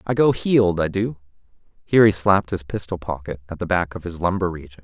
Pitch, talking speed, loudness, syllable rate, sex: 90 Hz, 225 wpm, -21 LUFS, 6.3 syllables/s, male